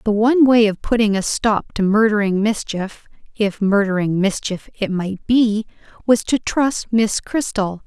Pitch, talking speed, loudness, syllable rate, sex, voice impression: 210 Hz, 160 wpm, -18 LUFS, 3.5 syllables/s, female, feminine, adult-like, tensed, powerful, bright, clear, fluent, intellectual, calm, reassuring, elegant, lively